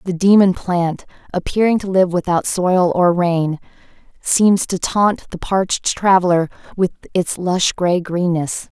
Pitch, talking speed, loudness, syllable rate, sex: 180 Hz, 145 wpm, -17 LUFS, 4.0 syllables/s, female